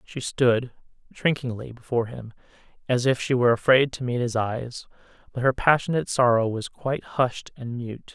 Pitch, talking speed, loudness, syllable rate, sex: 125 Hz, 170 wpm, -24 LUFS, 5.2 syllables/s, male